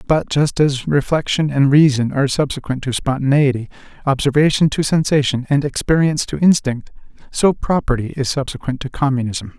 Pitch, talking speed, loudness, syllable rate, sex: 140 Hz, 145 wpm, -17 LUFS, 5.5 syllables/s, male